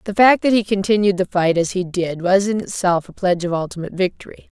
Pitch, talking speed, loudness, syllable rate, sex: 190 Hz, 235 wpm, -18 LUFS, 6.2 syllables/s, female